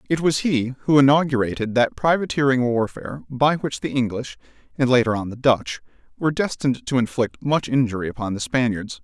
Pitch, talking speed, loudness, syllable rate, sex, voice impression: 125 Hz, 175 wpm, -21 LUFS, 5.7 syllables/s, male, very masculine, very middle-aged, thick, tensed, slightly powerful, slightly bright, soft, slightly muffled, slightly halting, slightly raspy, cool, intellectual, slightly refreshing, sincere, slightly calm, mature, friendly, reassuring, slightly unique, slightly elegant, wild, slightly sweet, lively, slightly strict, slightly intense